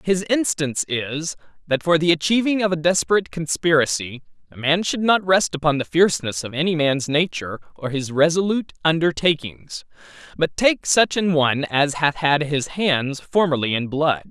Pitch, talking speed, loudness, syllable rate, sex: 160 Hz, 170 wpm, -20 LUFS, 5.1 syllables/s, male